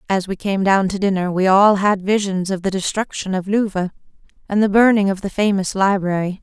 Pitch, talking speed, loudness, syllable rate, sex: 195 Hz, 205 wpm, -18 LUFS, 5.4 syllables/s, female